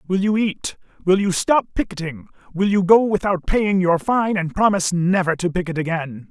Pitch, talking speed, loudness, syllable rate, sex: 185 Hz, 170 wpm, -19 LUFS, 5.1 syllables/s, female